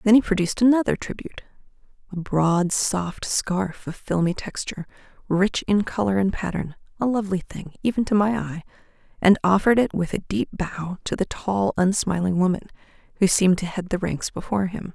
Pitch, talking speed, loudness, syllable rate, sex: 190 Hz, 175 wpm, -23 LUFS, 5.4 syllables/s, female